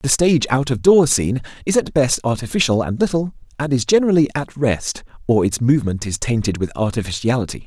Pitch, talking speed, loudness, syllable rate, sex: 130 Hz, 190 wpm, -18 LUFS, 6.1 syllables/s, male